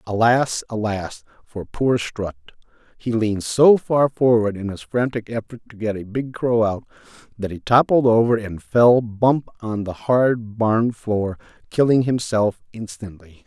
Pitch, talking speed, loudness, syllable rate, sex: 115 Hz, 155 wpm, -20 LUFS, 4.1 syllables/s, male